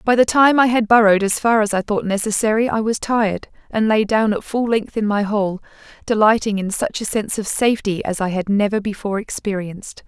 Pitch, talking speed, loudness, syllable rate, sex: 215 Hz, 220 wpm, -18 LUFS, 5.8 syllables/s, female